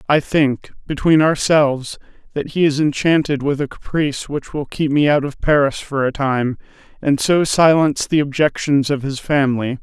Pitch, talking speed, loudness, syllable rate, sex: 145 Hz, 175 wpm, -17 LUFS, 5.0 syllables/s, male